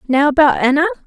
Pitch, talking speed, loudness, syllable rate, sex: 300 Hz, 170 wpm, -14 LUFS, 6.9 syllables/s, female